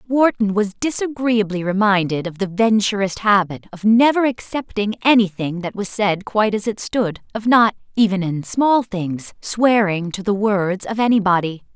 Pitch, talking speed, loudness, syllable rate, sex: 210 Hz, 155 wpm, -18 LUFS, 4.7 syllables/s, female